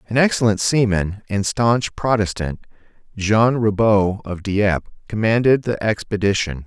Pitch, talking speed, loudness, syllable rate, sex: 105 Hz, 115 wpm, -19 LUFS, 4.4 syllables/s, male